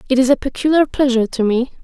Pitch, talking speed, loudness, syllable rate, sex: 255 Hz, 230 wpm, -16 LUFS, 7.1 syllables/s, female